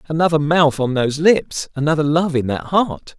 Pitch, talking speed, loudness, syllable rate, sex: 150 Hz, 190 wpm, -17 LUFS, 5.1 syllables/s, male